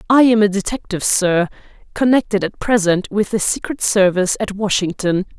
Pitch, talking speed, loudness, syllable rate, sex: 200 Hz, 155 wpm, -17 LUFS, 5.4 syllables/s, female